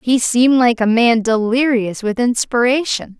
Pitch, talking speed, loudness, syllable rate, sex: 240 Hz, 150 wpm, -15 LUFS, 4.5 syllables/s, female